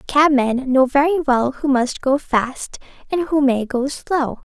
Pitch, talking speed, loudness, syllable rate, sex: 270 Hz, 175 wpm, -18 LUFS, 3.8 syllables/s, female